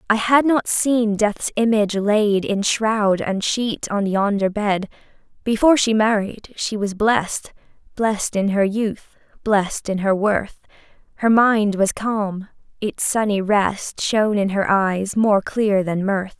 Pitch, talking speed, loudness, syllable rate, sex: 210 Hz, 155 wpm, -19 LUFS, 3.8 syllables/s, female